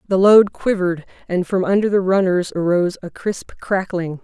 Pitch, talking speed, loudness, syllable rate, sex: 185 Hz, 170 wpm, -18 LUFS, 5.1 syllables/s, female